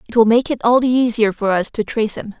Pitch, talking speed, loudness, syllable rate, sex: 230 Hz, 300 wpm, -16 LUFS, 6.3 syllables/s, female